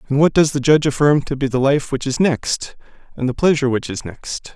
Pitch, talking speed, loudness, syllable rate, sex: 140 Hz, 250 wpm, -18 LUFS, 5.8 syllables/s, male